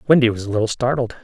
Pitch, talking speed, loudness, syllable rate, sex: 120 Hz, 245 wpm, -19 LUFS, 7.8 syllables/s, male